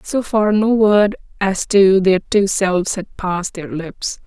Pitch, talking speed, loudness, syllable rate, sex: 195 Hz, 185 wpm, -16 LUFS, 4.0 syllables/s, female